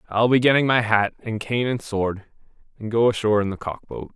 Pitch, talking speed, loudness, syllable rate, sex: 110 Hz, 230 wpm, -21 LUFS, 5.7 syllables/s, male